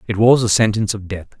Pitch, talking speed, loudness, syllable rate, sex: 105 Hz, 255 wpm, -16 LUFS, 7.0 syllables/s, male